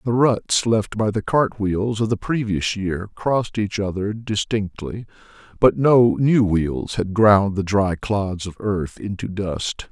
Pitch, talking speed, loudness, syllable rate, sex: 105 Hz, 170 wpm, -20 LUFS, 3.7 syllables/s, male